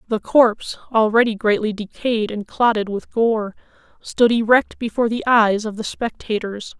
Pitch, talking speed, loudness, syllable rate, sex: 220 Hz, 150 wpm, -19 LUFS, 4.7 syllables/s, female